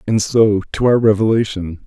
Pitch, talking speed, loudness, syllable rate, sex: 105 Hz, 160 wpm, -15 LUFS, 4.9 syllables/s, male